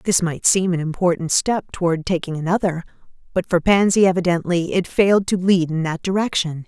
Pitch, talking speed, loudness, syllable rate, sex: 175 Hz, 180 wpm, -19 LUFS, 5.5 syllables/s, female